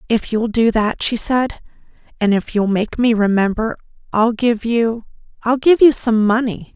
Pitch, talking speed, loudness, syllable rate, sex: 225 Hz, 170 wpm, -17 LUFS, 4.4 syllables/s, female